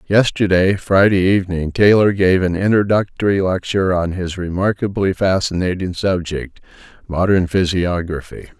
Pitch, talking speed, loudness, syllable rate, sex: 95 Hz, 100 wpm, -17 LUFS, 4.9 syllables/s, male